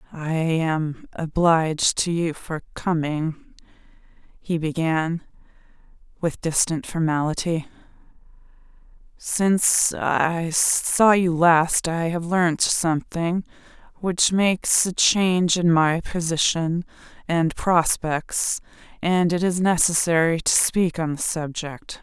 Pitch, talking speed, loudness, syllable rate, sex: 165 Hz, 105 wpm, -21 LUFS, 3.5 syllables/s, female